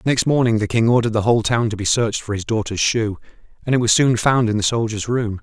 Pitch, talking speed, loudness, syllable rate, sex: 110 Hz, 265 wpm, -18 LUFS, 6.4 syllables/s, male